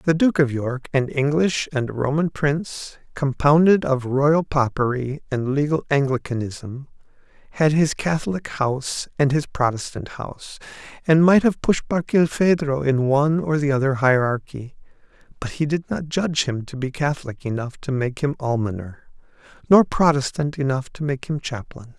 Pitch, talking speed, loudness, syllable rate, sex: 140 Hz, 155 wpm, -21 LUFS, 4.8 syllables/s, male